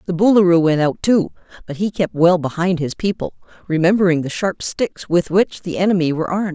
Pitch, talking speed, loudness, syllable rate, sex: 180 Hz, 200 wpm, -17 LUFS, 5.7 syllables/s, female